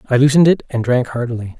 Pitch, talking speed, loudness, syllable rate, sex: 130 Hz, 225 wpm, -15 LUFS, 7.1 syllables/s, male